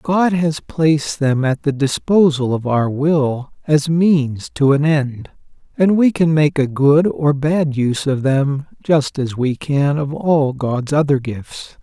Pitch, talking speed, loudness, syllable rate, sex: 145 Hz, 180 wpm, -16 LUFS, 3.6 syllables/s, male